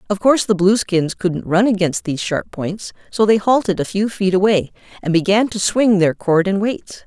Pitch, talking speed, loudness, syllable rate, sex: 195 Hz, 210 wpm, -17 LUFS, 5.0 syllables/s, female